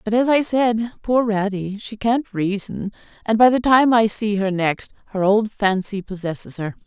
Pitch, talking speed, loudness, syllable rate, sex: 210 Hz, 190 wpm, -19 LUFS, 4.5 syllables/s, female